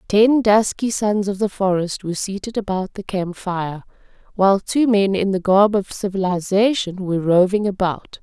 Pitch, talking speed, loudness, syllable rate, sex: 195 Hz, 170 wpm, -19 LUFS, 4.8 syllables/s, female